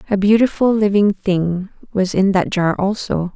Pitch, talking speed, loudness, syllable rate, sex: 200 Hz, 160 wpm, -17 LUFS, 4.5 syllables/s, female